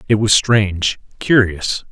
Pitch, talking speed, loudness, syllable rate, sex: 105 Hz, 125 wpm, -15 LUFS, 4.0 syllables/s, male